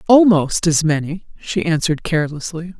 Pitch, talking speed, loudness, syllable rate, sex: 170 Hz, 130 wpm, -17 LUFS, 5.3 syllables/s, female